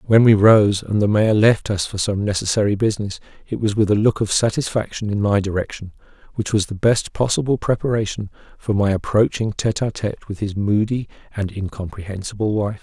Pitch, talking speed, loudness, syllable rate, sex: 105 Hz, 185 wpm, -19 LUFS, 5.7 syllables/s, male